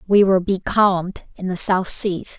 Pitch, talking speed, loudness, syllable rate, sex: 190 Hz, 175 wpm, -18 LUFS, 4.7 syllables/s, female